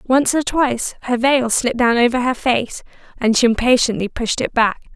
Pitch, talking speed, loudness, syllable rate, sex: 245 Hz, 195 wpm, -17 LUFS, 5.1 syllables/s, female